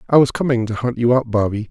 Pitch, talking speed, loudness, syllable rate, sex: 120 Hz, 280 wpm, -18 LUFS, 6.5 syllables/s, male